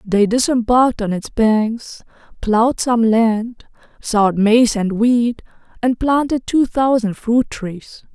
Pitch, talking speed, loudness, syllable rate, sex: 230 Hz, 135 wpm, -16 LUFS, 3.8 syllables/s, female